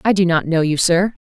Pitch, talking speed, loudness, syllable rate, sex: 175 Hz, 285 wpm, -16 LUFS, 5.6 syllables/s, female